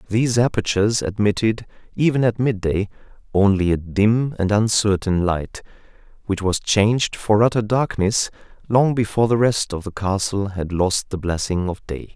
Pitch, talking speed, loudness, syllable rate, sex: 105 Hz, 160 wpm, -20 LUFS, 4.8 syllables/s, male